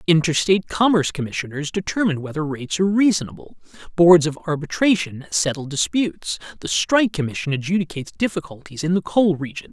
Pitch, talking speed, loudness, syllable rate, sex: 165 Hz, 135 wpm, -20 LUFS, 6.4 syllables/s, male